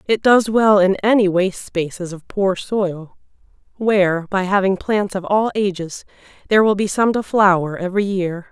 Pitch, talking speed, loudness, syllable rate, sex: 195 Hz, 175 wpm, -17 LUFS, 4.8 syllables/s, female